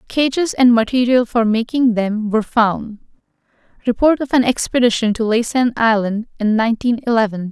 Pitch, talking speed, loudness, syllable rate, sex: 235 Hz, 135 wpm, -16 LUFS, 5.1 syllables/s, female